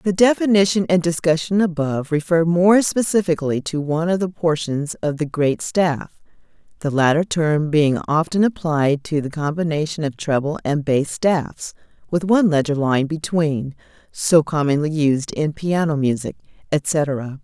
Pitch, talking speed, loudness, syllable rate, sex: 160 Hz, 150 wpm, -19 LUFS, 4.2 syllables/s, female